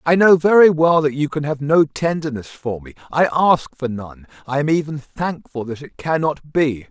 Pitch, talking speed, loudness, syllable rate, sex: 145 Hz, 210 wpm, -18 LUFS, 4.7 syllables/s, male